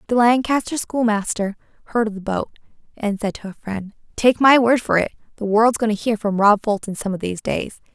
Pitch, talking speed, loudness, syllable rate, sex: 220 Hz, 220 wpm, -19 LUFS, 5.6 syllables/s, female